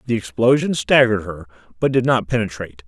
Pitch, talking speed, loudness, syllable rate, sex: 110 Hz, 165 wpm, -18 LUFS, 6.2 syllables/s, male